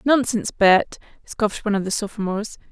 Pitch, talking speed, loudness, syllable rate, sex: 210 Hz, 155 wpm, -21 LUFS, 6.7 syllables/s, female